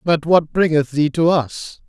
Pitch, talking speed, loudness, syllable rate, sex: 155 Hz, 190 wpm, -17 LUFS, 4.0 syllables/s, male